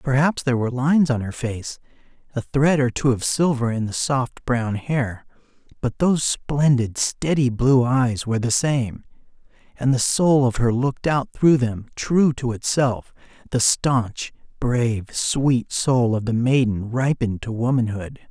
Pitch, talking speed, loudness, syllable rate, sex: 125 Hz, 165 wpm, -21 LUFS, 4.3 syllables/s, male